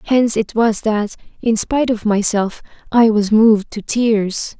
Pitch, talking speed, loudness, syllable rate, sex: 220 Hz, 170 wpm, -16 LUFS, 4.4 syllables/s, female